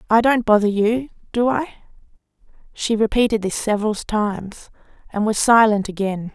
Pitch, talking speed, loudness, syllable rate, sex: 220 Hz, 140 wpm, -19 LUFS, 5.0 syllables/s, female